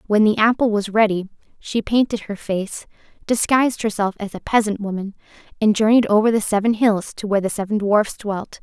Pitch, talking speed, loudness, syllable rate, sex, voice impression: 210 Hz, 190 wpm, -19 LUFS, 5.5 syllables/s, female, slightly feminine, young, cute, slightly refreshing, slightly friendly